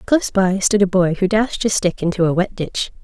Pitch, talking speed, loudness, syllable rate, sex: 190 Hz, 255 wpm, -17 LUFS, 5.4 syllables/s, female